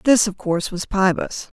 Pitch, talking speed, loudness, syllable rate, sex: 200 Hz, 190 wpm, -20 LUFS, 5.0 syllables/s, female